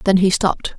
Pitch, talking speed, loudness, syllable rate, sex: 190 Hz, 230 wpm, -17 LUFS, 6.3 syllables/s, female